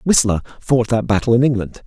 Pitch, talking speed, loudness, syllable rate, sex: 115 Hz, 195 wpm, -17 LUFS, 5.4 syllables/s, male